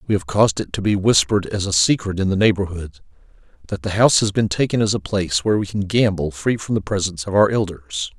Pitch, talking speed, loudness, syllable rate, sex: 95 Hz, 240 wpm, -19 LUFS, 6.5 syllables/s, male